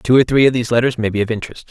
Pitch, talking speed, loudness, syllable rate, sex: 120 Hz, 350 wpm, -16 LUFS, 8.4 syllables/s, male